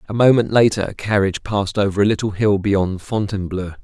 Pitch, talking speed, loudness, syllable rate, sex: 100 Hz, 190 wpm, -18 LUFS, 6.1 syllables/s, male